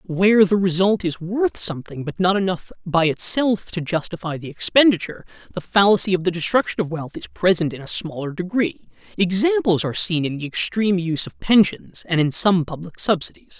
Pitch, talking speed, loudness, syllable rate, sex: 180 Hz, 185 wpm, -20 LUFS, 5.5 syllables/s, male